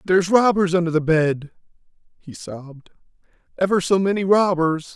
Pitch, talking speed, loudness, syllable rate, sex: 175 Hz, 135 wpm, -19 LUFS, 5.1 syllables/s, male